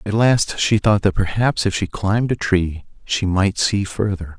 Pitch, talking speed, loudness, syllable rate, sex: 100 Hz, 205 wpm, -19 LUFS, 4.4 syllables/s, male